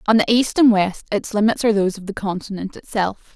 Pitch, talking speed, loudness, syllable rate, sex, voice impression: 205 Hz, 230 wpm, -19 LUFS, 6.1 syllables/s, female, feminine, adult-like, slightly intellectual, slightly calm, slightly elegant, slightly sweet